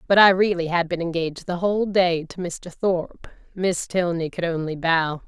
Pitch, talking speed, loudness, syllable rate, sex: 175 Hz, 195 wpm, -22 LUFS, 5.0 syllables/s, female